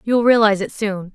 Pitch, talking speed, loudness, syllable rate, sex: 210 Hz, 265 wpm, -17 LUFS, 6.7 syllables/s, female